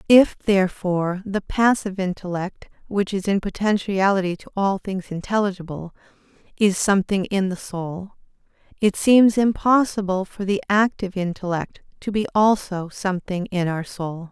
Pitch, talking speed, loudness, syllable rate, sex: 195 Hz, 135 wpm, -21 LUFS, 4.9 syllables/s, female